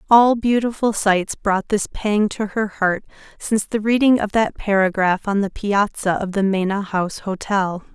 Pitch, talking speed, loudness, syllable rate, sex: 205 Hz, 175 wpm, -19 LUFS, 4.7 syllables/s, female